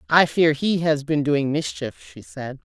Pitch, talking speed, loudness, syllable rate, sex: 150 Hz, 200 wpm, -21 LUFS, 4.2 syllables/s, female